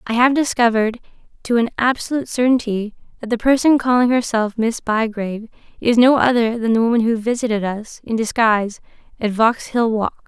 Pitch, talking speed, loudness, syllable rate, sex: 230 Hz, 165 wpm, -18 LUFS, 5.5 syllables/s, female